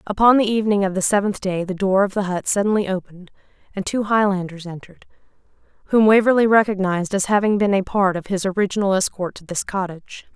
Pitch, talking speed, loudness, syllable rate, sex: 195 Hz, 190 wpm, -19 LUFS, 6.4 syllables/s, female